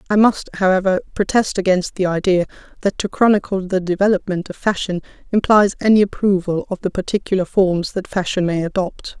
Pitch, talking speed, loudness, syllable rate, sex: 190 Hz, 165 wpm, -18 LUFS, 5.6 syllables/s, female